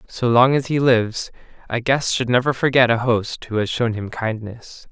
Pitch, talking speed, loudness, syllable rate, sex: 120 Hz, 210 wpm, -19 LUFS, 4.8 syllables/s, male